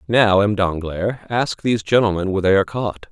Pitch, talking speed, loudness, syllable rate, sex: 100 Hz, 190 wpm, -18 LUFS, 5.8 syllables/s, male